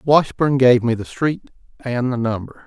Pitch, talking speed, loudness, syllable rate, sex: 125 Hz, 155 wpm, -18 LUFS, 3.8 syllables/s, male